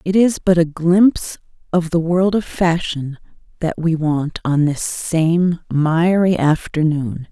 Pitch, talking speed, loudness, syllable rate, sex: 165 Hz, 150 wpm, -17 LUFS, 3.6 syllables/s, female